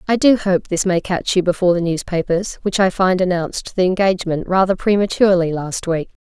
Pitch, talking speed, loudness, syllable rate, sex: 185 Hz, 190 wpm, -17 LUFS, 5.7 syllables/s, female